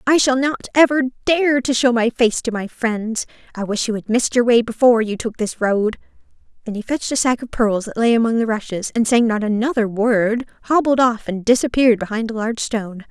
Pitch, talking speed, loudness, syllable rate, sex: 230 Hz, 225 wpm, -18 LUFS, 5.7 syllables/s, female